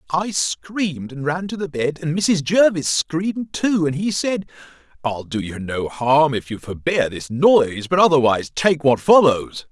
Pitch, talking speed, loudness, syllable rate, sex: 155 Hz, 185 wpm, -19 LUFS, 4.4 syllables/s, male